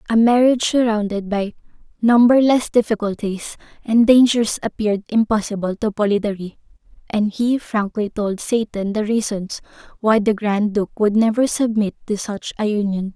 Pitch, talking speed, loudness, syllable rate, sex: 215 Hz, 135 wpm, -18 LUFS, 4.9 syllables/s, female